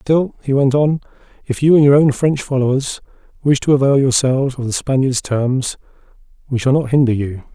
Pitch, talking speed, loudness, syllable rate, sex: 135 Hz, 190 wpm, -16 LUFS, 5.3 syllables/s, male